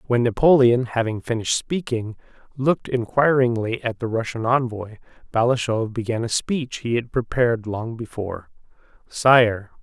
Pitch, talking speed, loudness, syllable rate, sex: 120 Hz, 130 wpm, -21 LUFS, 4.8 syllables/s, male